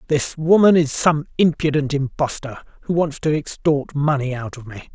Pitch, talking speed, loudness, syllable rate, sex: 145 Hz, 170 wpm, -19 LUFS, 4.8 syllables/s, male